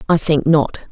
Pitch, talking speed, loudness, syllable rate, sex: 150 Hz, 195 wpm, -15 LUFS, 4.8 syllables/s, female